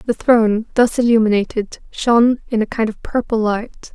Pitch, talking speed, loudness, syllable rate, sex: 225 Hz, 165 wpm, -17 LUFS, 5.1 syllables/s, female